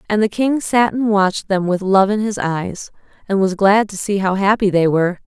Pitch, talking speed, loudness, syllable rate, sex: 200 Hz, 240 wpm, -16 LUFS, 5.1 syllables/s, female